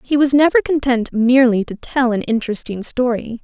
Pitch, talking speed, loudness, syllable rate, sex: 245 Hz, 175 wpm, -16 LUFS, 5.5 syllables/s, female